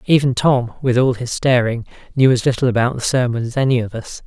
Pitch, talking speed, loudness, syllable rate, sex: 125 Hz, 225 wpm, -17 LUFS, 5.8 syllables/s, male